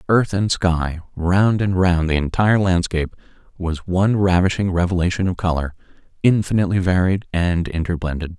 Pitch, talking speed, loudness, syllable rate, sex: 90 Hz, 135 wpm, -19 LUFS, 5.3 syllables/s, male